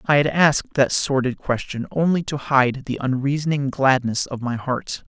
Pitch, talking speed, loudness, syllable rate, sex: 135 Hz, 175 wpm, -21 LUFS, 4.8 syllables/s, male